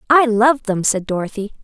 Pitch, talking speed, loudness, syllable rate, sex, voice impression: 225 Hz, 185 wpm, -17 LUFS, 5.2 syllables/s, female, very feminine, slightly young, thin, tensed, weak, bright, soft, very clear, very fluent, slightly raspy, very cute, very intellectual, refreshing, very sincere, calm, very friendly, very reassuring, very unique, very elegant, slightly wild, very sweet, lively, very kind, slightly intense, slightly modest, light